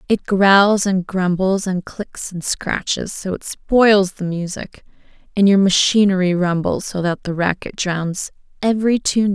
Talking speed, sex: 165 wpm, female